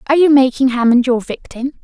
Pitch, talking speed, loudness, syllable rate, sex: 260 Hz, 195 wpm, -13 LUFS, 6.3 syllables/s, female